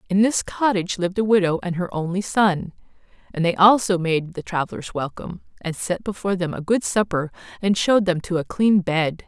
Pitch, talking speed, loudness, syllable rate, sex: 185 Hz, 200 wpm, -21 LUFS, 5.6 syllables/s, female